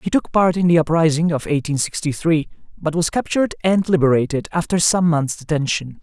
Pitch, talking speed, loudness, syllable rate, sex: 160 Hz, 190 wpm, -18 LUFS, 5.5 syllables/s, male